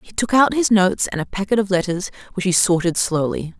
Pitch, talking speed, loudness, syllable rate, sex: 195 Hz, 235 wpm, -19 LUFS, 5.9 syllables/s, female